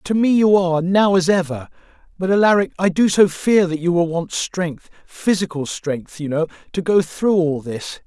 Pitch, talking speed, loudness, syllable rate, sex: 175 Hz, 200 wpm, -18 LUFS, 4.7 syllables/s, male